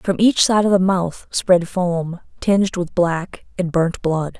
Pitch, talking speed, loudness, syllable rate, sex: 180 Hz, 190 wpm, -18 LUFS, 3.7 syllables/s, female